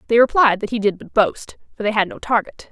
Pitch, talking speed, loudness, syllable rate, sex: 230 Hz, 265 wpm, -18 LUFS, 6.0 syllables/s, female